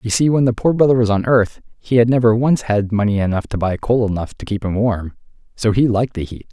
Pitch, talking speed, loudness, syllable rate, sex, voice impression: 110 Hz, 265 wpm, -17 LUFS, 6.0 syllables/s, male, very masculine, adult-like, slightly middle-aged, very thick, tensed, powerful, slightly bright, slightly soft, muffled, very fluent, slightly raspy, cool, slightly intellectual, slightly refreshing, very sincere, slightly calm, mature, slightly friendly, slightly reassuring, unique, elegant, slightly wild, very lively, intense, light